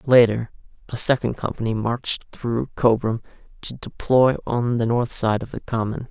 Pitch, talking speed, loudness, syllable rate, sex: 115 Hz, 155 wpm, -21 LUFS, 4.8 syllables/s, male